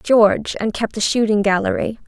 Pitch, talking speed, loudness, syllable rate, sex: 215 Hz, 175 wpm, -18 LUFS, 5.1 syllables/s, female